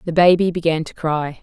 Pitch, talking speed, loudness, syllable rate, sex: 165 Hz, 210 wpm, -18 LUFS, 5.4 syllables/s, female